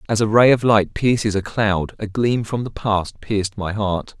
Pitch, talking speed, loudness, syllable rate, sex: 105 Hz, 230 wpm, -19 LUFS, 4.6 syllables/s, male